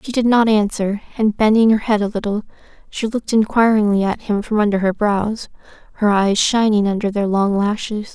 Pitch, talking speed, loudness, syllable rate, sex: 210 Hz, 190 wpm, -17 LUFS, 5.3 syllables/s, female